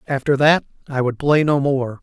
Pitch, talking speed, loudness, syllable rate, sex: 140 Hz, 210 wpm, -18 LUFS, 5.0 syllables/s, male